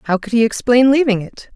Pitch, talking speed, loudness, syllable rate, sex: 230 Hz, 230 wpm, -15 LUFS, 5.3 syllables/s, female